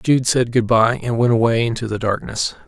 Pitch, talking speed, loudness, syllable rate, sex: 115 Hz, 225 wpm, -18 LUFS, 5.1 syllables/s, male